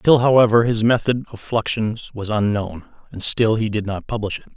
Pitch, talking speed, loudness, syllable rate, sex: 110 Hz, 195 wpm, -19 LUFS, 5.1 syllables/s, male